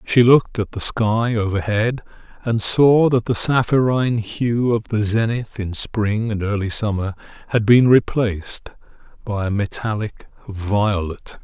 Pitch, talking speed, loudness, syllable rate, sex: 110 Hz, 140 wpm, -18 LUFS, 4.2 syllables/s, male